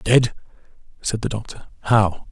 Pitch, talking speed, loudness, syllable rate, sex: 110 Hz, 130 wpm, -21 LUFS, 4.3 syllables/s, male